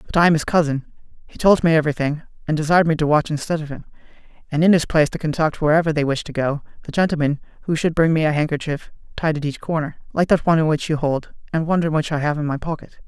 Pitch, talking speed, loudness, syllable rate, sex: 155 Hz, 245 wpm, -20 LUFS, 6.9 syllables/s, male